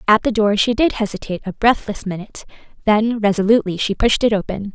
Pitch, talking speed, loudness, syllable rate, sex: 210 Hz, 190 wpm, -18 LUFS, 6.2 syllables/s, female